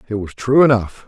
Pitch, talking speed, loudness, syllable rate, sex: 115 Hz, 225 wpm, -16 LUFS, 5.5 syllables/s, male